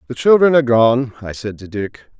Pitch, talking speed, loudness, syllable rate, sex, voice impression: 120 Hz, 220 wpm, -15 LUFS, 5.7 syllables/s, male, masculine, very adult-like, slightly thick, slightly intellectual, calm, slightly elegant, slightly sweet